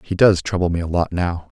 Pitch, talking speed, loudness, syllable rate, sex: 90 Hz, 265 wpm, -19 LUFS, 5.6 syllables/s, male